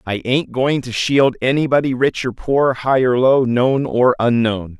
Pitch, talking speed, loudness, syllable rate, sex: 125 Hz, 190 wpm, -16 LUFS, 4.2 syllables/s, male